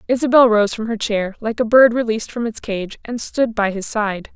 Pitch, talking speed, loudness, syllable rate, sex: 225 Hz, 235 wpm, -18 LUFS, 5.2 syllables/s, female